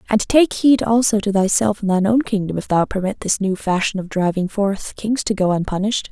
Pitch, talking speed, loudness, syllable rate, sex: 205 Hz, 225 wpm, -18 LUFS, 5.6 syllables/s, female